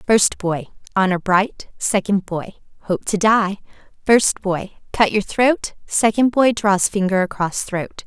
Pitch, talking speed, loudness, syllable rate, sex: 200 Hz, 150 wpm, -18 LUFS, 3.9 syllables/s, female